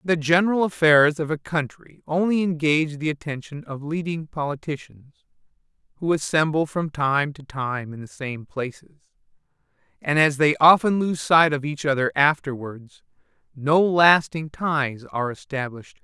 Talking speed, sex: 150 wpm, male